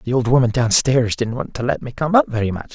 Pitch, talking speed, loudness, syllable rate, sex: 125 Hz, 305 wpm, -18 LUFS, 6.2 syllables/s, male